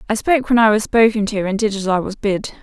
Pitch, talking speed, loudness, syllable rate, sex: 210 Hz, 295 wpm, -17 LUFS, 6.3 syllables/s, female